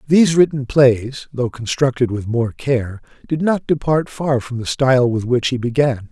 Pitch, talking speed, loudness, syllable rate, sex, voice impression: 130 Hz, 185 wpm, -17 LUFS, 4.6 syllables/s, male, very masculine, very adult-like, very thick, very tensed, very powerful, bright, soft, muffled, fluent, raspy, cool, very intellectual, sincere, very calm, very reassuring, very unique, elegant, very wild, sweet, lively, very kind